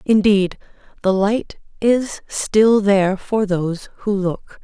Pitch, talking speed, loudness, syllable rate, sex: 200 Hz, 130 wpm, -18 LUFS, 3.6 syllables/s, female